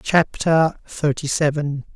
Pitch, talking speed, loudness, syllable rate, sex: 150 Hz, 90 wpm, -20 LUFS, 3.6 syllables/s, male